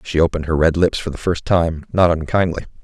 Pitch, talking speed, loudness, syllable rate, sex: 80 Hz, 230 wpm, -18 LUFS, 5.9 syllables/s, male